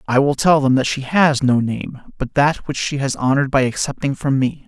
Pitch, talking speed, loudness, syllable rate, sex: 135 Hz, 245 wpm, -17 LUFS, 5.3 syllables/s, male